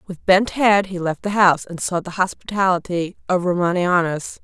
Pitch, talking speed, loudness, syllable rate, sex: 180 Hz, 175 wpm, -19 LUFS, 5.1 syllables/s, female